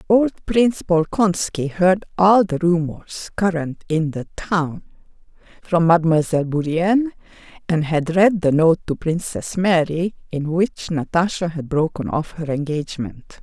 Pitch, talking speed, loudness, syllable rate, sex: 170 Hz, 135 wpm, -19 LUFS, 4.3 syllables/s, female